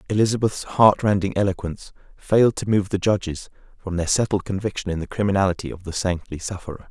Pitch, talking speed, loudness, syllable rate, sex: 95 Hz, 175 wpm, -22 LUFS, 6.3 syllables/s, male